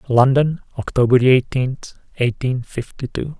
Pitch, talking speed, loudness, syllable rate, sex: 130 Hz, 105 wpm, -18 LUFS, 4.2 syllables/s, male